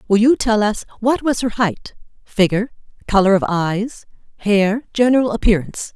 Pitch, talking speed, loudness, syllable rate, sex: 215 Hz, 150 wpm, -17 LUFS, 5.1 syllables/s, female